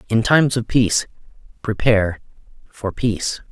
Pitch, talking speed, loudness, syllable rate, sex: 110 Hz, 120 wpm, -19 LUFS, 5.2 syllables/s, male